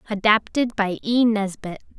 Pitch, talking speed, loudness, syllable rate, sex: 215 Hz, 120 wpm, -21 LUFS, 4.6 syllables/s, female